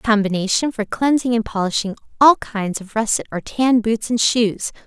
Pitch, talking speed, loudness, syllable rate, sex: 220 Hz, 175 wpm, -18 LUFS, 4.8 syllables/s, female